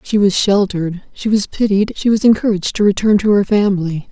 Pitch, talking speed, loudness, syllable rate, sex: 200 Hz, 205 wpm, -15 LUFS, 5.9 syllables/s, female